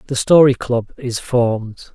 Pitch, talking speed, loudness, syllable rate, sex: 125 Hz, 155 wpm, -16 LUFS, 4.1 syllables/s, male